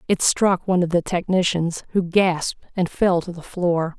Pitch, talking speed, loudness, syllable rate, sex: 175 Hz, 195 wpm, -21 LUFS, 4.8 syllables/s, female